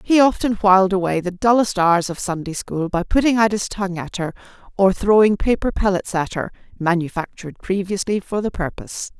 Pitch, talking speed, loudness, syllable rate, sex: 190 Hz, 185 wpm, -19 LUFS, 4.4 syllables/s, female